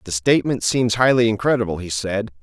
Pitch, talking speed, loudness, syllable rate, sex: 110 Hz, 175 wpm, -19 LUFS, 5.8 syllables/s, male